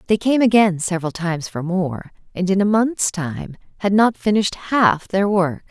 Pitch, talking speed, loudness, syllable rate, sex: 190 Hz, 190 wpm, -19 LUFS, 4.8 syllables/s, female